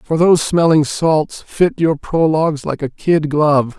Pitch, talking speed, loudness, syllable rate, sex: 155 Hz, 175 wpm, -15 LUFS, 4.4 syllables/s, male